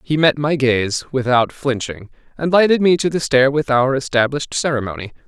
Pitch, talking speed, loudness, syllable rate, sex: 135 Hz, 180 wpm, -17 LUFS, 5.3 syllables/s, male